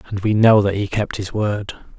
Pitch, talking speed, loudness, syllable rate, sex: 100 Hz, 240 wpm, -18 LUFS, 5.1 syllables/s, male